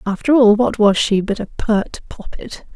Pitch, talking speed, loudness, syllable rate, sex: 220 Hz, 195 wpm, -15 LUFS, 4.6 syllables/s, female